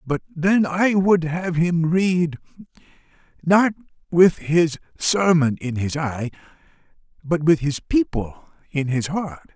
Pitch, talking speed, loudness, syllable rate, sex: 165 Hz, 125 wpm, -20 LUFS, 3.5 syllables/s, male